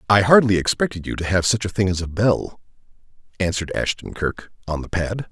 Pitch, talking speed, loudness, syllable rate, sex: 100 Hz, 205 wpm, -20 LUFS, 5.7 syllables/s, male